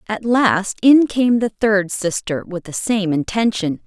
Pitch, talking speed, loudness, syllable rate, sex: 205 Hz, 170 wpm, -17 LUFS, 3.9 syllables/s, female